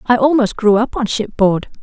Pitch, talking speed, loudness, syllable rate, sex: 230 Hz, 195 wpm, -15 LUFS, 4.9 syllables/s, female